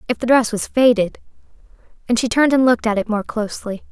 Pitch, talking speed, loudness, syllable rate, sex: 230 Hz, 200 wpm, -17 LUFS, 6.7 syllables/s, female